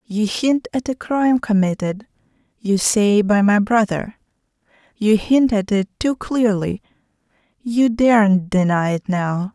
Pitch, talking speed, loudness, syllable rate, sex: 215 Hz, 140 wpm, -18 LUFS, 4.0 syllables/s, female